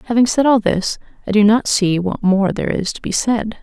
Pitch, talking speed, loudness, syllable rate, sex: 210 Hz, 250 wpm, -16 LUFS, 5.4 syllables/s, female